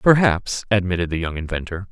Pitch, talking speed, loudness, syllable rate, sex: 95 Hz, 155 wpm, -21 LUFS, 5.5 syllables/s, male